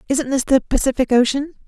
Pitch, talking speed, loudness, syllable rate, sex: 265 Hz, 180 wpm, -18 LUFS, 6.1 syllables/s, female